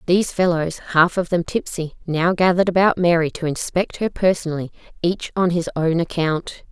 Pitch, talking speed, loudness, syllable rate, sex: 170 Hz, 170 wpm, -20 LUFS, 5.2 syllables/s, female